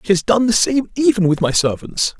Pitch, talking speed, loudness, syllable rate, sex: 205 Hz, 245 wpm, -16 LUFS, 5.4 syllables/s, male